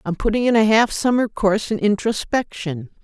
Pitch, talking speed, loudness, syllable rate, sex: 210 Hz, 180 wpm, -19 LUFS, 5.3 syllables/s, female